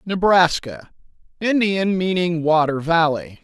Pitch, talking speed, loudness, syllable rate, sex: 170 Hz, 70 wpm, -18 LUFS, 3.9 syllables/s, male